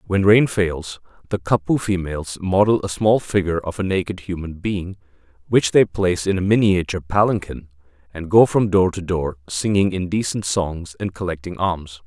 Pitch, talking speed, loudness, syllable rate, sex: 90 Hz, 170 wpm, -20 LUFS, 5.2 syllables/s, male